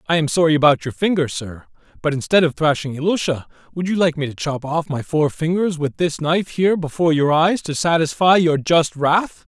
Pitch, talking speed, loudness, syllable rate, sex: 155 Hz, 215 wpm, -18 LUFS, 5.5 syllables/s, male